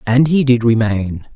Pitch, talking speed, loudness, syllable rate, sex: 120 Hz, 180 wpm, -14 LUFS, 4.3 syllables/s, male